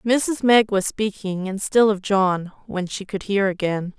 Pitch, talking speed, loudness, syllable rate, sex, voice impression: 200 Hz, 195 wpm, -21 LUFS, 4.0 syllables/s, female, feminine, adult-like, intellectual, slightly calm, slightly sharp